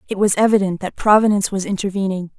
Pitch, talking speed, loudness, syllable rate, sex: 195 Hz, 175 wpm, -17 LUFS, 7.0 syllables/s, female